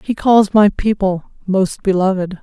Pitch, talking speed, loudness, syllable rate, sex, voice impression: 195 Hz, 150 wpm, -15 LUFS, 4.3 syllables/s, female, feminine, adult-like, slightly intellectual, calm